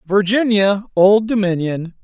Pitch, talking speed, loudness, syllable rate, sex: 200 Hz, 90 wpm, -15 LUFS, 3.9 syllables/s, male